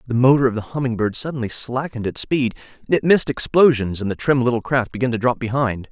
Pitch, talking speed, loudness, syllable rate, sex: 125 Hz, 225 wpm, -19 LUFS, 6.3 syllables/s, male